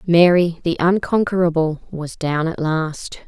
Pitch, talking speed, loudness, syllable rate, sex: 165 Hz, 130 wpm, -18 LUFS, 4.1 syllables/s, female